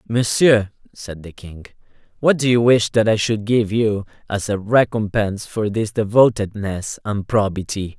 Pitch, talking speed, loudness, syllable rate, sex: 105 Hz, 160 wpm, -18 LUFS, 4.4 syllables/s, male